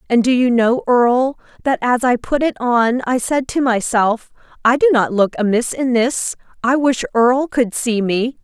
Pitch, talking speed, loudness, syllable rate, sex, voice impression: 245 Hz, 200 wpm, -16 LUFS, 4.5 syllables/s, female, very feminine, middle-aged, thin, tensed, slightly powerful, slightly bright, hard, clear, fluent, slightly cute, intellectual, refreshing, slightly sincere, slightly calm, slightly friendly, slightly reassuring, slightly unique, elegant, slightly wild, slightly sweet, slightly lively, kind, slightly light